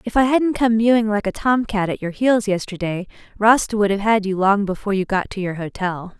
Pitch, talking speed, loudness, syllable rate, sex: 205 Hz, 240 wpm, -19 LUFS, 5.6 syllables/s, female